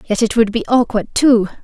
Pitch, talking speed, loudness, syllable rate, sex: 235 Hz, 220 wpm, -15 LUFS, 5.2 syllables/s, female